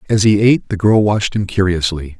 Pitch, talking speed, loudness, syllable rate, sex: 100 Hz, 220 wpm, -14 LUFS, 6.0 syllables/s, male